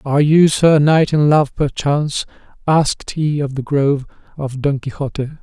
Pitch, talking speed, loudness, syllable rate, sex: 145 Hz, 165 wpm, -16 LUFS, 4.9 syllables/s, male